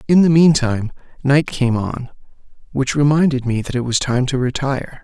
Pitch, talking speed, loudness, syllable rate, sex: 135 Hz, 190 wpm, -17 LUFS, 5.1 syllables/s, male